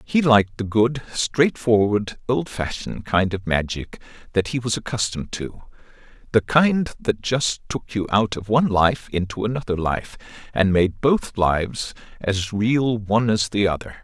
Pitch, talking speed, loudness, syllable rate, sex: 110 Hz, 155 wpm, -21 LUFS, 4.5 syllables/s, male